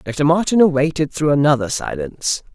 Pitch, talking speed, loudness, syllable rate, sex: 145 Hz, 140 wpm, -17 LUFS, 5.5 syllables/s, male